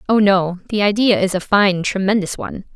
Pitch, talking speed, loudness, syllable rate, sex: 200 Hz, 195 wpm, -17 LUFS, 5.4 syllables/s, female